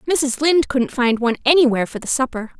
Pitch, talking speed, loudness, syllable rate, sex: 260 Hz, 210 wpm, -18 LUFS, 6.5 syllables/s, female